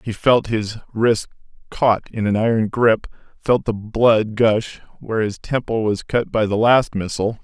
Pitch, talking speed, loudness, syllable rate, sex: 110 Hz, 180 wpm, -19 LUFS, 4.4 syllables/s, male